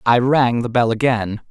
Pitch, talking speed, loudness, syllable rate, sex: 120 Hz, 200 wpm, -17 LUFS, 4.5 syllables/s, male